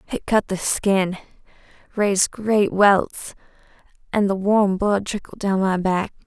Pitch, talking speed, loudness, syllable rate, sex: 200 Hz, 145 wpm, -20 LUFS, 3.9 syllables/s, female